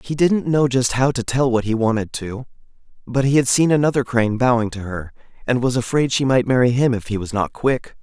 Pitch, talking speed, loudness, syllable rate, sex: 125 Hz, 240 wpm, -19 LUFS, 5.6 syllables/s, male